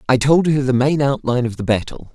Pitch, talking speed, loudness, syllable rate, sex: 130 Hz, 250 wpm, -17 LUFS, 6.0 syllables/s, male